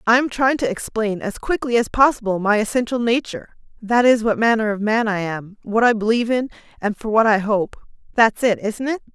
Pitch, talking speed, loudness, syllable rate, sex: 225 Hz, 215 wpm, -19 LUFS, 5.6 syllables/s, female